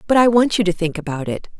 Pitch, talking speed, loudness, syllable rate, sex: 190 Hz, 300 wpm, -18 LUFS, 6.6 syllables/s, female